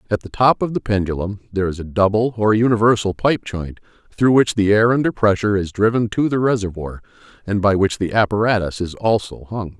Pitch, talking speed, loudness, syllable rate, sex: 105 Hz, 200 wpm, -18 LUFS, 5.8 syllables/s, male